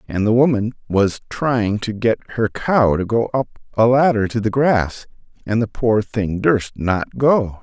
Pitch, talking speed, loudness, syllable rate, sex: 115 Hz, 190 wpm, -18 LUFS, 4.0 syllables/s, male